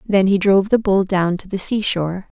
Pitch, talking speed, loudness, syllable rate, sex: 195 Hz, 225 wpm, -18 LUFS, 5.5 syllables/s, female